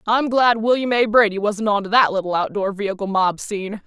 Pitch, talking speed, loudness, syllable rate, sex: 210 Hz, 200 wpm, -19 LUFS, 5.7 syllables/s, female